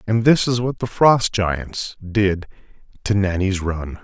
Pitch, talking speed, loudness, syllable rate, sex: 105 Hz, 165 wpm, -19 LUFS, 3.6 syllables/s, male